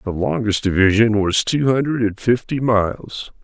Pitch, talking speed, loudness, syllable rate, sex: 110 Hz, 155 wpm, -18 LUFS, 4.6 syllables/s, male